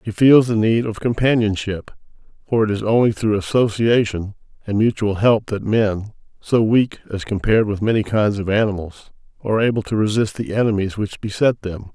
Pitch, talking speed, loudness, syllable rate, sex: 105 Hz, 175 wpm, -18 LUFS, 5.4 syllables/s, male